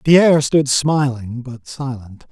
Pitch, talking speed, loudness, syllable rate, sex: 135 Hz, 130 wpm, -16 LUFS, 3.7 syllables/s, male